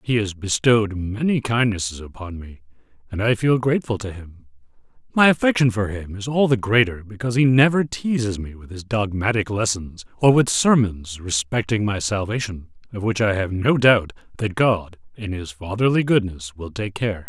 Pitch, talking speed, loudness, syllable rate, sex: 105 Hz, 175 wpm, -20 LUFS, 5.1 syllables/s, male